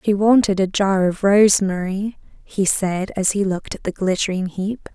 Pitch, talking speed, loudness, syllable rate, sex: 195 Hz, 180 wpm, -19 LUFS, 4.8 syllables/s, female